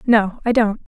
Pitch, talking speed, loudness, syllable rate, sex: 220 Hz, 180 wpm, -18 LUFS, 4.4 syllables/s, female